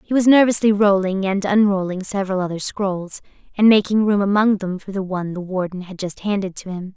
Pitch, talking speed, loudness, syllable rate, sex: 195 Hz, 205 wpm, -19 LUFS, 5.7 syllables/s, female